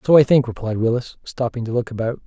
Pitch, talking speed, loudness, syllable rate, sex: 120 Hz, 240 wpm, -20 LUFS, 6.3 syllables/s, male